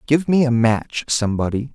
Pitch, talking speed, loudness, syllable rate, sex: 125 Hz, 170 wpm, -19 LUFS, 5.1 syllables/s, male